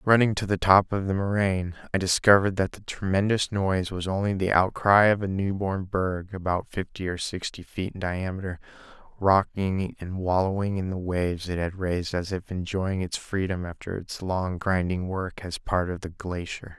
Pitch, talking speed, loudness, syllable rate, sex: 95 Hz, 185 wpm, -26 LUFS, 5.0 syllables/s, male